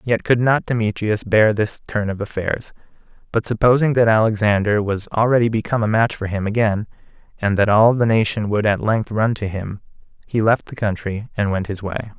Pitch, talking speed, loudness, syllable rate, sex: 110 Hz, 195 wpm, -19 LUFS, 5.4 syllables/s, male